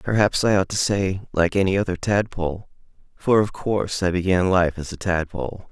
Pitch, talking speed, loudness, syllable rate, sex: 95 Hz, 190 wpm, -22 LUFS, 5.3 syllables/s, male